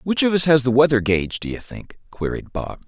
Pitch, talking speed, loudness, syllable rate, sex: 135 Hz, 230 wpm, -19 LUFS, 5.3 syllables/s, male